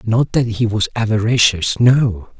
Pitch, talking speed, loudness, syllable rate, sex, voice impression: 110 Hz, 125 wpm, -15 LUFS, 4.1 syllables/s, male, masculine, adult-like, tensed, powerful, hard, slightly muffled, raspy, intellectual, mature, wild, strict